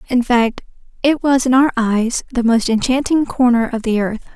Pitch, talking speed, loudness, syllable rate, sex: 245 Hz, 195 wpm, -16 LUFS, 4.8 syllables/s, female